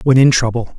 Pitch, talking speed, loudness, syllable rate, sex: 125 Hz, 230 wpm, -13 LUFS, 6.1 syllables/s, male